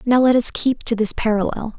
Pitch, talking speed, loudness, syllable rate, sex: 230 Hz, 235 wpm, -18 LUFS, 5.5 syllables/s, female